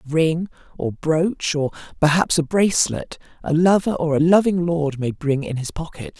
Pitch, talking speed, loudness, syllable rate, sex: 160 Hz, 185 wpm, -20 LUFS, 4.8 syllables/s, female